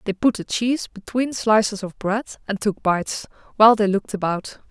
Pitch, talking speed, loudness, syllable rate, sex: 210 Hz, 190 wpm, -21 LUFS, 5.4 syllables/s, female